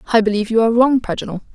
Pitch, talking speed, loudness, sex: 225 Hz, 230 wpm, -16 LUFS, female